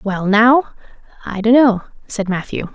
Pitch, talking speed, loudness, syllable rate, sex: 220 Hz, 130 wpm, -15 LUFS, 4.0 syllables/s, female